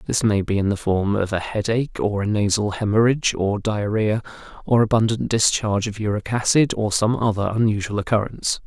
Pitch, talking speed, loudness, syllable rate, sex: 105 Hz, 180 wpm, -21 LUFS, 5.6 syllables/s, male